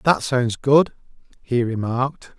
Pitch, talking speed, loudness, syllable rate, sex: 125 Hz, 125 wpm, -20 LUFS, 3.9 syllables/s, male